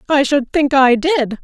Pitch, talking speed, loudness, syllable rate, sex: 270 Hz, 210 wpm, -14 LUFS, 4.2 syllables/s, female